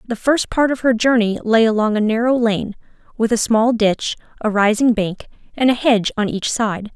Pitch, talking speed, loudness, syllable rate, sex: 225 Hz, 205 wpm, -17 LUFS, 5.1 syllables/s, female